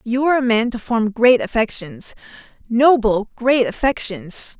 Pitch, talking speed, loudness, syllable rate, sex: 235 Hz, 130 wpm, -17 LUFS, 4.4 syllables/s, female